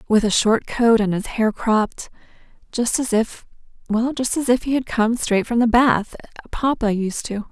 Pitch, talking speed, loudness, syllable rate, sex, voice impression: 230 Hz, 200 wpm, -20 LUFS, 4.6 syllables/s, female, feminine, adult-like, slightly relaxed, powerful, clear, fluent, intellectual, calm, elegant, lively, slightly modest